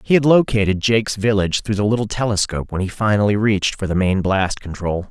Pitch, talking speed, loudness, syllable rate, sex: 105 Hz, 210 wpm, -18 LUFS, 6.2 syllables/s, male